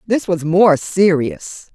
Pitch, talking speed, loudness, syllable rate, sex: 180 Hz, 140 wpm, -15 LUFS, 3.2 syllables/s, female